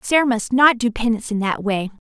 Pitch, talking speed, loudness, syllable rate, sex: 230 Hz, 230 wpm, -18 LUFS, 6.0 syllables/s, female